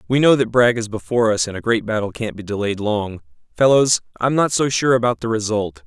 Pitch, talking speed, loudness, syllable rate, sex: 110 Hz, 235 wpm, -18 LUFS, 5.8 syllables/s, male